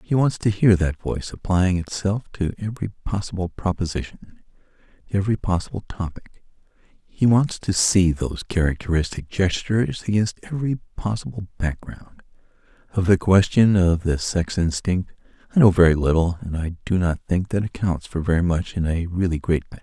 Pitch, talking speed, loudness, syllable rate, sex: 95 Hz, 165 wpm, -22 LUFS, 5.2 syllables/s, male